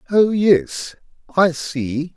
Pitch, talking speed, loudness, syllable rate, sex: 165 Hz, 110 wpm, -18 LUFS, 2.5 syllables/s, male